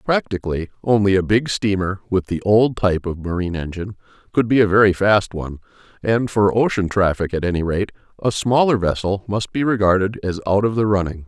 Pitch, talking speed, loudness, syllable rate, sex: 100 Hz, 190 wpm, -19 LUFS, 5.7 syllables/s, male